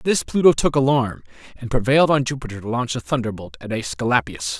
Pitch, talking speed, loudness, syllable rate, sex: 125 Hz, 195 wpm, -20 LUFS, 6.2 syllables/s, male